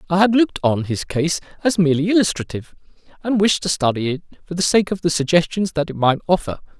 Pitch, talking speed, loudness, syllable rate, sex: 170 Hz, 210 wpm, -19 LUFS, 6.5 syllables/s, male